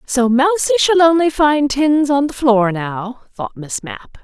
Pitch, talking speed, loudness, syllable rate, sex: 265 Hz, 185 wpm, -15 LUFS, 4.0 syllables/s, female